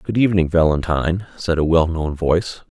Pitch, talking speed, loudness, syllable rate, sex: 85 Hz, 155 wpm, -18 LUFS, 5.5 syllables/s, male